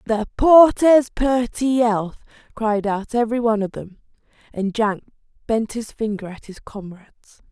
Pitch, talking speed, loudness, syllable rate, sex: 225 Hz, 145 wpm, -19 LUFS, 4.7 syllables/s, female